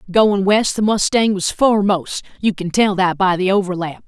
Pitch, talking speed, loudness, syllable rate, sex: 195 Hz, 190 wpm, -16 LUFS, 4.9 syllables/s, female